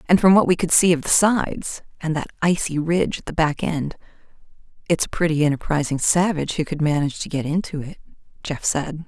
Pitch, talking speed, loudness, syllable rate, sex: 160 Hz, 190 wpm, -21 LUFS, 6.0 syllables/s, female